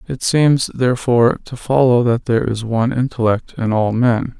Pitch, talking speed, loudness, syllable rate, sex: 120 Hz, 180 wpm, -16 LUFS, 5.0 syllables/s, male